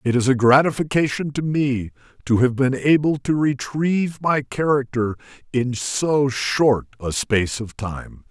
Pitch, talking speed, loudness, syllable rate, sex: 135 Hz, 150 wpm, -20 LUFS, 4.3 syllables/s, male